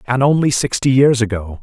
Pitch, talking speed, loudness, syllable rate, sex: 125 Hz, 185 wpm, -15 LUFS, 5.4 syllables/s, male